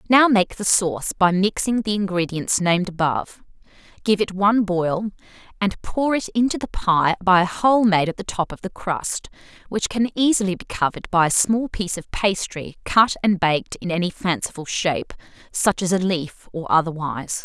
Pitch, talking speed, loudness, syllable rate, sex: 190 Hz, 180 wpm, -21 LUFS, 5.1 syllables/s, female